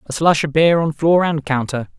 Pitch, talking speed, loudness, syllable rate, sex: 155 Hz, 240 wpm, -16 LUFS, 5.0 syllables/s, male